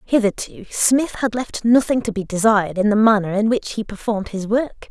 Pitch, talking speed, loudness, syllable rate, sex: 215 Hz, 220 wpm, -19 LUFS, 5.5 syllables/s, female